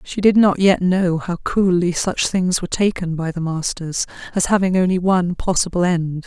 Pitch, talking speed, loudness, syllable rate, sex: 180 Hz, 190 wpm, -18 LUFS, 4.9 syllables/s, female